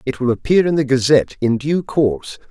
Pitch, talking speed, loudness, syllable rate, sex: 135 Hz, 215 wpm, -17 LUFS, 5.7 syllables/s, male